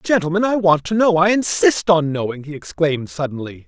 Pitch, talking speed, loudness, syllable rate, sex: 170 Hz, 195 wpm, -17 LUFS, 5.5 syllables/s, male